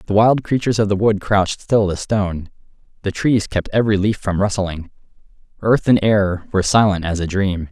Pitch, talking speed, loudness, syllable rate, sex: 100 Hz, 195 wpm, -18 LUFS, 5.5 syllables/s, male